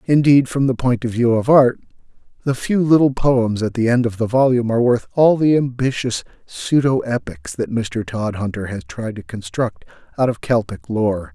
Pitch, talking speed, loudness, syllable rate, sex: 115 Hz, 190 wpm, -18 LUFS, 4.9 syllables/s, male